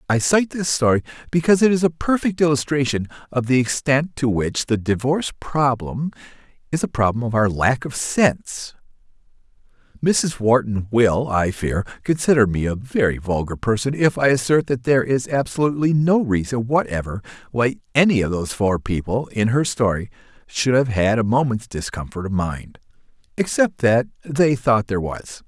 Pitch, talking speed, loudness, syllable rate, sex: 125 Hz, 165 wpm, -20 LUFS, 5.1 syllables/s, male